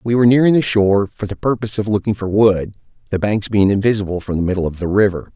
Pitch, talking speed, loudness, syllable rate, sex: 105 Hz, 245 wpm, -16 LUFS, 6.8 syllables/s, male